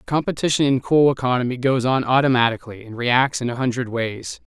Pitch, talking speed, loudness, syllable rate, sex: 125 Hz, 185 wpm, -19 LUFS, 6.1 syllables/s, male